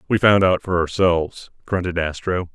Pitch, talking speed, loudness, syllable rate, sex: 90 Hz, 165 wpm, -19 LUFS, 4.9 syllables/s, male